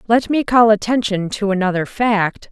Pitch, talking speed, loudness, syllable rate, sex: 215 Hz, 165 wpm, -16 LUFS, 4.7 syllables/s, female